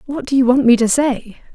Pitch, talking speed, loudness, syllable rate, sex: 250 Hz, 275 wpm, -14 LUFS, 5.7 syllables/s, female